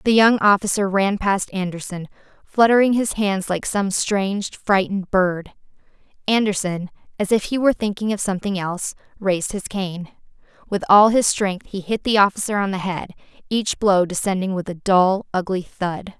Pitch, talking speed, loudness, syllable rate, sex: 195 Hz, 165 wpm, -20 LUFS, 5.0 syllables/s, female